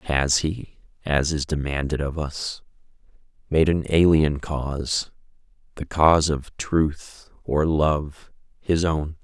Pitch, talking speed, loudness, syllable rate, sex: 75 Hz, 125 wpm, -22 LUFS, 3.6 syllables/s, male